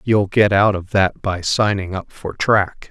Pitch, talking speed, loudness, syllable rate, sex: 100 Hz, 205 wpm, -18 LUFS, 3.9 syllables/s, male